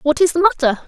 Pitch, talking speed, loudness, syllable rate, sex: 305 Hz, 275 wpm, -15 LUFS, 6.1 syllables/s, female